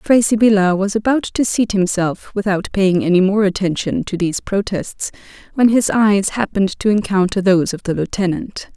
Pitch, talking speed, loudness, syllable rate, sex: 200 Hz, 170 wpm, -16 LUFS, 5.2 syllables/s, female